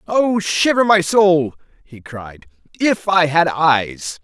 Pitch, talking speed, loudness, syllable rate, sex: 160 Hz, 140 wpm, -16 LUFS, 3.2 syllables/s, male